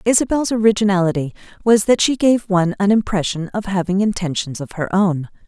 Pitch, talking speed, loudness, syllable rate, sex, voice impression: 195 Hz, 165 wpm, -18 LUFS, 5.8 syllables/s, female, feminine, adult-like, tensed, powerful, hard, clear, intellectual, calm, elegant, lively, strict, slightly sharp